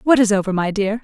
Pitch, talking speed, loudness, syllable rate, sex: 210 Hz, 290 wpm, -17 LUFS, 6.5 syllables/s, female